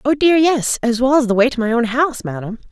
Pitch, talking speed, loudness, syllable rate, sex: 250 Hz, 290 wpm, -16 LUFS, 6.0 syllables/s, female